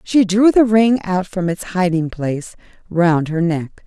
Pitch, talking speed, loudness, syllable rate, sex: 185 Hz, 185 wpm, -17 LUFS, 4.1 syllables/s, female